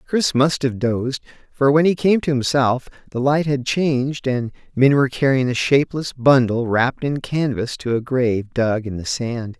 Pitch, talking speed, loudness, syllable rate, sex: 130 Hz, 195 wpm, -19 LUFS, 4.9 syllables/s, male